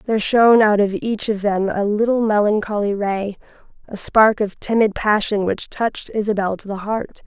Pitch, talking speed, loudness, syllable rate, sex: 210 Hz, 175 wpm, -18 LUFS, 5.0 syllables/s, female